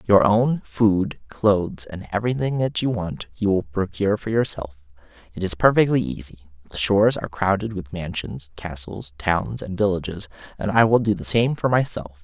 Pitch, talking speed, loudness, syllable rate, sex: 100 Hz, 175 wpm, -22 LUFS, 5.0 syllables/s, male